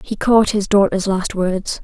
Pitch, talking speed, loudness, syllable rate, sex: 200 Hz, 195 wpm, -16 LUFS, 4.1 syllables/s, female